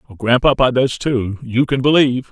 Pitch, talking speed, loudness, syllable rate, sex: 125 Hz, 155 wpm, -16 LUFS, 5.3 syllables/s, male